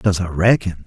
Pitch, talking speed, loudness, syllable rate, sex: 95 Hz, 210 wpm, -17 LUFS, 4.8 syllables/s, male